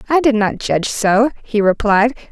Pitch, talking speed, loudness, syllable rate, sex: 225 Hz, 180 wpm, -15 LUFS, 4.8 syllables/s, female